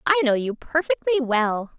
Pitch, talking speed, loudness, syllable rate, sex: 270 Hz, 170 wpm, -22 LUFS, 5.2 syllables/s, female